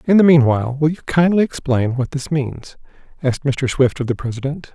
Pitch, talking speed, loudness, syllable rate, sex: 140 Hz, 200 wpm, -18 LUFS, 5.6 syllables/s, male